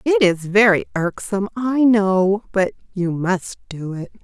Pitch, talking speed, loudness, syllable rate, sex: 200 Hz, 155 wpm, -19 LUFS, 4.0 syllables/s, female